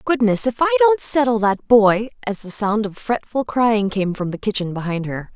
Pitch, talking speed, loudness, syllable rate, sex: 220 Hz, 200 wpm, -19 LUFS, 4.9 syllables/s, female